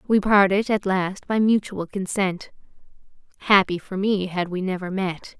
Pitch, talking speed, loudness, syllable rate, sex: 195 Hz, 145 wpm, -22 LUFS, 4.4 syllables/s, female